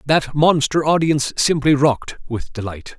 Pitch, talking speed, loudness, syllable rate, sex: 145 Hz, 140 wpm, -18 LUFS, 4.9 syllables/s, male